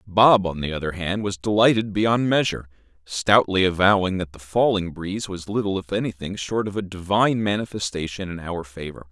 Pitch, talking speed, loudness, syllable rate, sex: 95 Hz, 180 wpm, -22 LUFS, 5.5 syllables/s, male